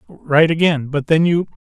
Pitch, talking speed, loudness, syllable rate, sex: 155 Hz, 145 wpm, -16 LUFS, 4.6 syllables/s, male